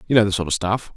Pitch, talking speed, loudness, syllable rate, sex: 105 Hz, 375 wpm, -20 LUFS, 7.8 syllables/s, male